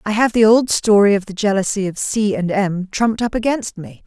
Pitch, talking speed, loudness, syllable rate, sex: 205 Hz, 205 wpm, -16 LUFS, 4.8 syllables/s, female